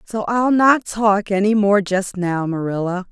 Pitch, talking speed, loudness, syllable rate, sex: 200 Hz, 175 wpm, -18 LUFS, 4.0 syllables/s, female